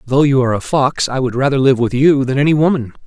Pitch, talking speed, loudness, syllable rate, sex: 135 Hz, 275 wpm, -14 LUFS, 6.5 syllables/s, male